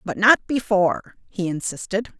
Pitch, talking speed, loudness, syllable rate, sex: 200 Hz, 135 wpm, -21 LUFS, 4.9 syllables/s, female